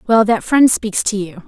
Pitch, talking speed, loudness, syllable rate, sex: 210 Hz, 245 wpm, -15 LUFS, 4.5 syllables/s, female